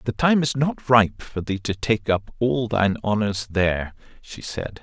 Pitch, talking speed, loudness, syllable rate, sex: 110 Hz, 200 wpm, -22 LUFS, 4.5 syllables/s, male